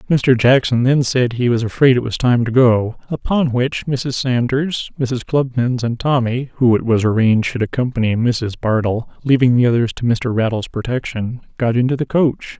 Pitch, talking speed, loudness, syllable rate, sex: 125 Hz, 185 wpm, -17 LUFS, 2.9 syllables/s, male